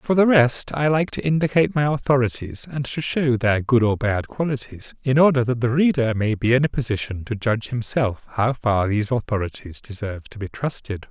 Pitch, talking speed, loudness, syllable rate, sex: 125 Hz, 205 wpm, -21 LUFS, 5.5 syllables/s, male